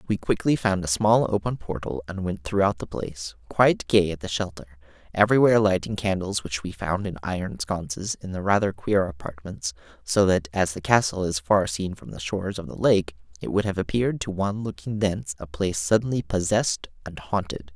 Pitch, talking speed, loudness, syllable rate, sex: 95 Hz, 200 wpm, -24 LUFS, 5.5 syllables/s, male